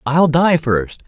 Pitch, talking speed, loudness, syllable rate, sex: 150 Hz, 170 wpm, -15 LUFS, 3.2 syllables/s, male